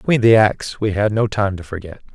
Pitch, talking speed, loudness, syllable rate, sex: 105 Hz, 250 wpm, -17 LUFS, 5.5 syllables/s, male